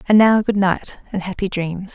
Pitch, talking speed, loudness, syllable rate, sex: 195 Hz, 215 wpm, -19 LUFS, 4.7 syllables/s, female